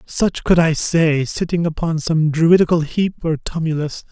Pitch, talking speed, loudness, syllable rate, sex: 160 Hz, 160 wpm, -17 LUFS, 4.4 syllables/s, male